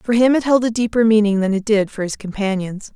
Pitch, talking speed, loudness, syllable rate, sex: 215 Hz, 265 wpm, -17 LUFS, 5.9 syllables/s, female